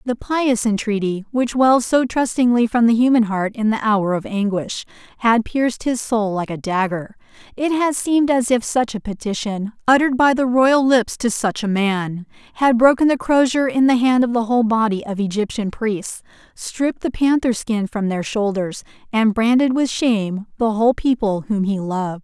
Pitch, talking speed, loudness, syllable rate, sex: 230 Hz, 190 wpm, -18 LUFS, 4.9 syllables/s, female